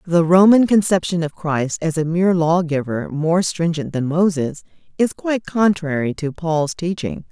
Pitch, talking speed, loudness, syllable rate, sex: 170 Hz, 155 wpm, -18 LUFS, 4.5 syllables/s, female